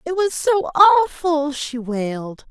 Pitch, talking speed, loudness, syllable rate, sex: 305 Hz, 145 wpm, -18 LUFS, 4.4 syllables/s, female